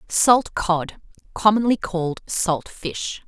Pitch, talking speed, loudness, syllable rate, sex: 190 Hz, 110 wpm, -21 LUFS, 3.4 syllables/s, female